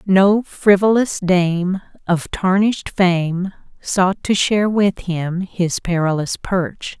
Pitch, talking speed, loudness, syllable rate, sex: 185 Hz, 120 wpm, -18 LUFS, 3.3 syllables/s, female